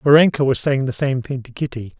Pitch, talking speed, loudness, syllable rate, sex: 130 Hz, 240 wpm, -19 LUFS, 5.7 syllables/s, male